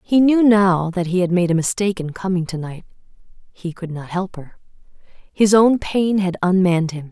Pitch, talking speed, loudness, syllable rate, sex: 185 Hz, 195 wpm, -18 LUFS, 5.1 syllables/s, female